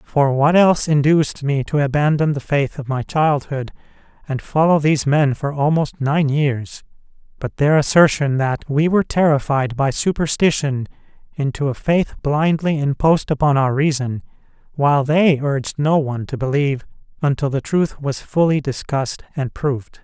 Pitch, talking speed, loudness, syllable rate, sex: 145 Hz, 155 wpm, -18 LUFS, 4.9 syllables/s, male